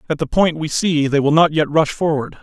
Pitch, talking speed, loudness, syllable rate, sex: 155 Hz, 270 wpm, -17 LUFS, 5.3 syllables/s, male